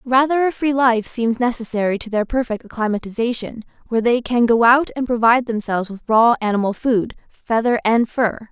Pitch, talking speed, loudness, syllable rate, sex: 235 Hz, 175 wpm, -18 LUFS, 5.5 syllables/s, female